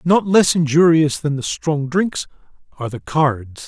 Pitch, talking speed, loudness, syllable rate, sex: 155 Hz, 165 wpm, -17 LUFS, 4.2 syllables/s, male